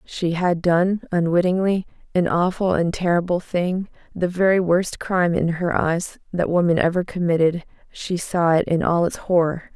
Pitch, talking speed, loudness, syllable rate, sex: 175 Hz, 140 wpm, -21 LUFS, 4.6 syllables/s, female